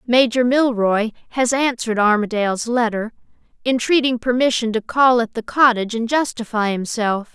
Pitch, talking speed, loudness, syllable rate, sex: 235 Hz, 130 wpm, -18 LUFS, 5.1 syllables/s, female